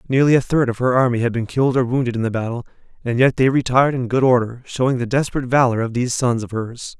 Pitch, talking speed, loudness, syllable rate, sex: 125 Hz, 255 wpm, -18 LUFS, 6.9 syllables/s, male